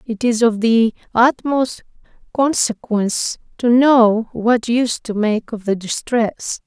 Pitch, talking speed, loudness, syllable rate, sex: 230 Hz, 135 wpm, -17 LUFS, 3.7 syllables/s, female